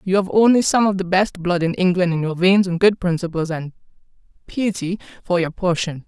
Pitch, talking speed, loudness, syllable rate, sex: 180 Hz, 210 wpm, -19 LUFS, 5.5 syllables/s, female